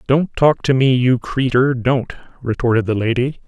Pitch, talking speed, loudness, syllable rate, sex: 125 Hz, 175 wpm, -17 LUFS, 4.8 syllables/s, male